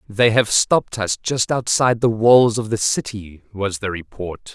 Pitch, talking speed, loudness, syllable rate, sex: 110 Hz, 185 wpm, -18 LUFS, 4.5 syllables/s, male